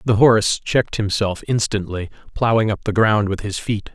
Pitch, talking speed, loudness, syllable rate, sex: 105 Hz, 185 wpm, -19 LUFS, 5.2 syllables/s, male